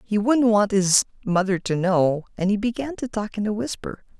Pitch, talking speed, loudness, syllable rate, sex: 205 Hz, 215 wpm, -22 LUFS, 5.0 syllables/s, female